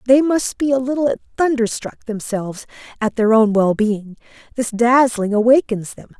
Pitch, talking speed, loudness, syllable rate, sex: 235 Hz, 145 wpm, -17 LUFS, 4.9 syllables/s, female